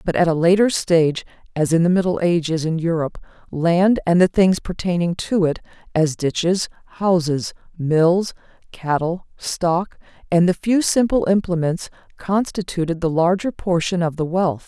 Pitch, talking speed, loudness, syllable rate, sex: 175 Hz, 150 wpm, -19 LUFS, 4.7 syllables/s, female